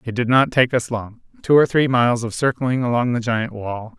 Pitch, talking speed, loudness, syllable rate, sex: 120 Hz, 225 wpm, -19 LUFS, 5.1 syllables/s, male